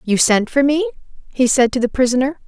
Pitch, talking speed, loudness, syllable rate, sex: 250 Hz, 220 wpm, -16 LUFS, 6.0 syllables/s, female